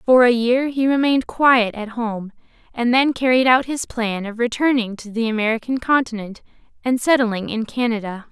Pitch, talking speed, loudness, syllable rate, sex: 240 Hz, 175 wpm, -19 LUFS, 5.0 syllables/s, female